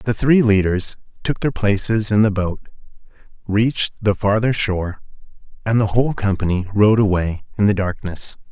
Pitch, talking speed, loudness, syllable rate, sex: 105 Hz, 155 wpm, -18 LUFS, 5.0 syllables/s, male